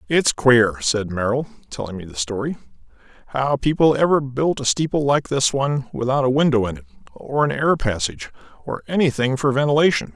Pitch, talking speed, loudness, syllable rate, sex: 125 Hz, 175 wpm, -20 LUFS, 5.6 syllables/s, male